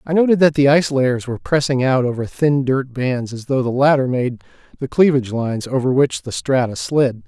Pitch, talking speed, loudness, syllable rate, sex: 135 Hz, 215 wpm, -17 LUFS, 5.5 syllables/s, male